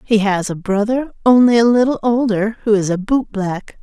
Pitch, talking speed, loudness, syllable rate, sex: 220 Hz, 190 wpm, -16 LUFS, 4.9 syllables/s, female